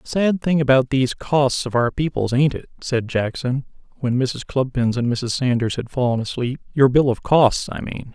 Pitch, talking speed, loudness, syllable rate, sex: 130 Hz, 200 wpm, -20 LUFS, 4.8 syllables/s, male